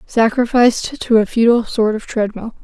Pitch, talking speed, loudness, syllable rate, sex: 225 Hz, 160 wpm, -15 LUFS, 5.3 syllables/s, female